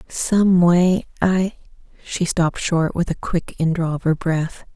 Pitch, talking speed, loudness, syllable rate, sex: 170 Hz, 165 wpm, -19 LUFS, 4.2 syllables/s, female